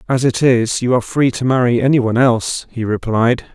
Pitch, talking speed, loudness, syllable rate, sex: 120 Hz, 205 wpm, -15 LUFS, 5.4 syllables/s, male